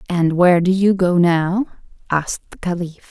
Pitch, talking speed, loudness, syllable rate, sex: 180 Hz, 175 wpm, -17 LUFS, 5.3 syllables/s, female